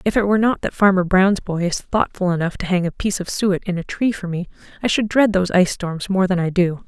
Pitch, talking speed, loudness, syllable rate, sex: 190 Hz, 280 wpm, -19 LUFS, 6.1 syllables/s, female